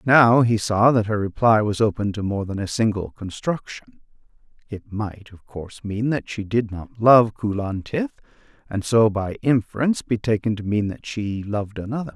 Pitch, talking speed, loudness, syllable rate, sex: 110 Hz, 190 wpm, -21 LUFS, 4.9 syllables/s, male